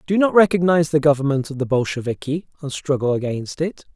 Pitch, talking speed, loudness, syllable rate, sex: 150 Hz, 180 wpm, -20 LUFS, 6.1 syllables/s, male